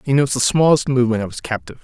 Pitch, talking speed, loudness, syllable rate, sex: 125 Hz, 260 wpm, -17 LUFS, 8.1 syllables/s, male